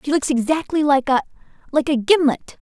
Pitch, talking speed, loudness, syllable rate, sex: 280 Hz, 155 wpm, -19 LUFS, 5.6 syllables/s, female